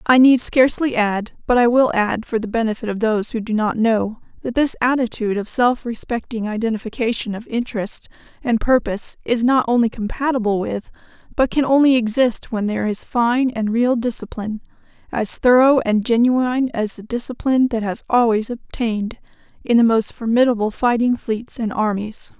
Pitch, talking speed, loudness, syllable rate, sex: 230 Hz, 170 wpm, -19 LUFS, 5.3 syllables/s, female